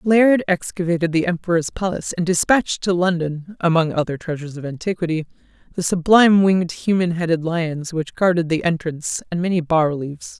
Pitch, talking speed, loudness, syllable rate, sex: 170 Hz, 160 wpm, -19 LUFS, 5.7 syllables/s, female